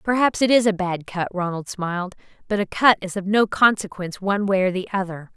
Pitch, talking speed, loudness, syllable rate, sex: 195 Hz, 225 wpm, -21 LUFS, 5.8 syllables/s, female